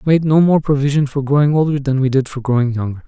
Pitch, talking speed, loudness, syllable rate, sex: 140 Hz, 275 wpm, -15 LUFS, 6.8 syllables/s, male